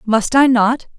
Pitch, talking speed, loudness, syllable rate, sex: 240 Hz, 180 wpm, -14 LUFS, 3.8 syllables/s, female